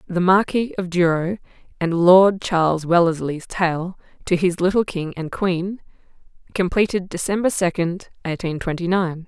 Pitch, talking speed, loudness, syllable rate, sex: 180 Hz, 135 wpm, -20 LUFS, 4.5 syllables/s, female